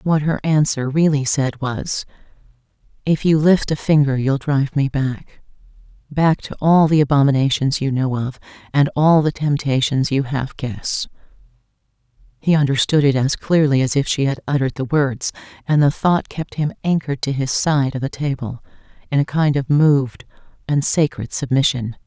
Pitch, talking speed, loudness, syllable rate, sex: 140 Hz, 170 wpm, -18 LUFS, 4.9 syllables/s, female